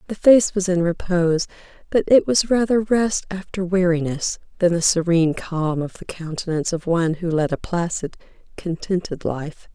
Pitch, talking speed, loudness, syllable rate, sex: 175 Hz, 165 wpm, -20 LUFS, 5.0 syllables/s, female